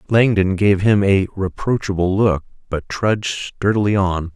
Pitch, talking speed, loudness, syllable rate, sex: 100 Hz, 140 wpm, -18 LUFS, 4.3 syllables/s, male